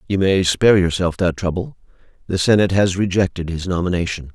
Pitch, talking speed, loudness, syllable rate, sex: 90 Hz, 165 wpm, -18 LUFS, 6.0 syllables/s, male